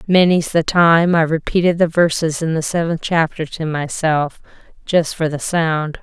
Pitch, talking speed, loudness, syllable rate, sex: 160 Hz, 170 wpm, -17 LUFS, 4.6 syllables/s, female